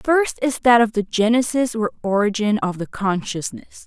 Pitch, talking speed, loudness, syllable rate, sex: 225 Hz, 185 wpm, -19 LUFS, 4.9 syllables/s, female